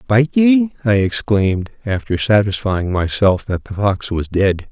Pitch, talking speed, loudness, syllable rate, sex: 105 Hz, 155 wpm, -17 LUFS, 4.2 syllables/s, male